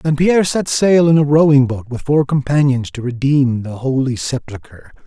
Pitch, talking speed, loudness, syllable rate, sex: 135 Hz, 190 wpm, -15 LUFS, 5.0 syllables/s, male